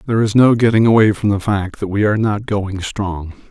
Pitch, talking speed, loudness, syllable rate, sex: 105 Hz, 240 wpm, -16 LUFS, 5.6 syllables/s, male